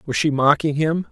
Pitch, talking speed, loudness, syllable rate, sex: 150 Hz, 215 wpm, -19 LUFS, 5.1 syllables/s, male